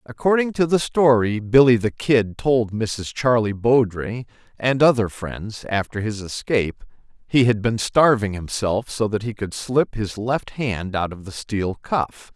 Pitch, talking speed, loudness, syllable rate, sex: 115 Hz, 170 wpm, -21 LUFS, 4.1 syllables/s, male